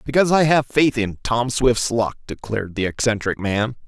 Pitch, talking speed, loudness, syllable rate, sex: 120 Hz, 185 wpm, -20 LUFS, 5.1 syllables/s, male